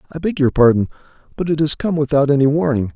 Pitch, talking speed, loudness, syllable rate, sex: 145 Hz, 225 wpm, -17 LUFS, 6.7 syllables/s, male